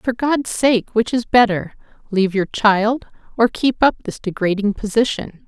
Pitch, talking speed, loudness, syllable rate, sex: 220 Hz, 165 wpm, -18 LUFS, 4.9 syllables/s, female